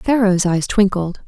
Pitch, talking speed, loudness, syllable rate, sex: 195 Hz, 140 wpm, -17 LUFS, 4.3 syllables/s, female